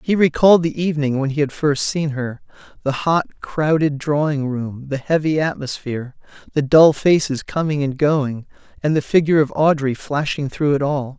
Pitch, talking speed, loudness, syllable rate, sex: 145 Hz, 170 wpm, -18 LUFS, 5.0 syllables/s, male